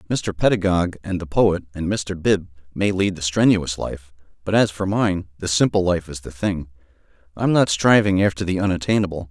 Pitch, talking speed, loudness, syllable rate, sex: 90 Hz, 185 wpm, -20 LUFS, 5.1 syllables/s, male